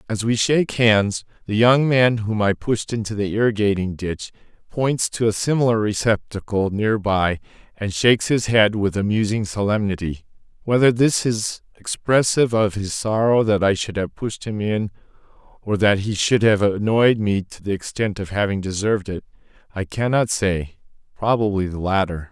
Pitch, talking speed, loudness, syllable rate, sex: 105 Hz, 165 wpm, -20 LUFS, 4.8 syllables/s, male